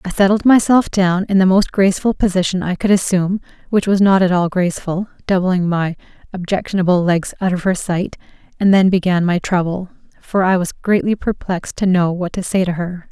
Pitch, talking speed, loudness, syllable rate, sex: 185 Hz, 195 wpm, -16 LUFS, 5.6 syllables/s, female